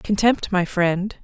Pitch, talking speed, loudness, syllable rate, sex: 195 Hz, 145 wpm, -20 LUFS, 3.4 syllables/s, female